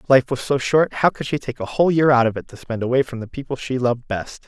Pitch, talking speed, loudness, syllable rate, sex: 130 Hz, 310 wpm, -20 LUFS, 6.3 syllables/s, male